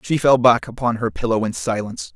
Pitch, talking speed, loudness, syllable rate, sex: 115 Hz, 225 wpm, -19 LUFS, 5.9 syllables/s, male